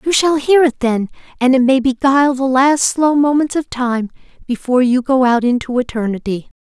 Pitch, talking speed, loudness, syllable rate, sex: 260 Hz, 190 wpm, -15 LUFS, 5.2 syllables/s, female